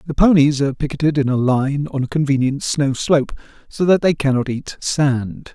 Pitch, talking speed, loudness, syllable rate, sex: 140 Hz, 195 wpm, -18 LUFS, 5.2 syllables/s, male